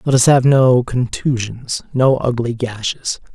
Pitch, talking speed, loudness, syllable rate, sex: 125 Hz, 145 wpm, -16 LUFS, 4.0 syllables/s, male